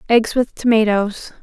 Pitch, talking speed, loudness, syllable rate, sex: 220 Hz, 125 wpm, -17 LUFS, 4.3 syllables/s, female